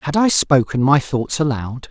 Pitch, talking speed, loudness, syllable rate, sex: 135 Hz, 190 wpm, -17 LUFS, 4.5 syllables/s, male